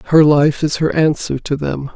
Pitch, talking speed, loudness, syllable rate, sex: 150 Hz, 215 wpm, -15 LUFS, 4.7 syllables/s, female